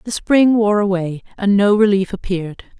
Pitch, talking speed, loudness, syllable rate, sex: 200 Hz, 170 wpm, -16 LUFS, 5.0 syllables/s, female